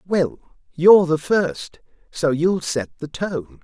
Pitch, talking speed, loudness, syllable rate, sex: 160 Hz, 150 wpm, -19 LUFS, 3.2 syllables/s, male